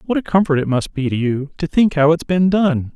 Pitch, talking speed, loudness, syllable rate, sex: 160 Hz, 285 wpm, -17 LUFS, 5.5 syllables/s, male